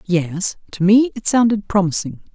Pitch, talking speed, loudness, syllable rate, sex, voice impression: 200 Hz, 155 wpm, -17 LUFS, 4.7 syllables/s, female, feminine, adult-like, fluent, intellectual, slightly calm, slightly elegant